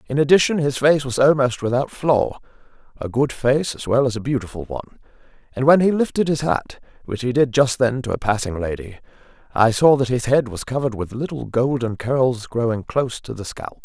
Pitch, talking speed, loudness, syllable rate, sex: 125 Hz, 205 wpm, -20 LUFS, 5.5 syllables/s, male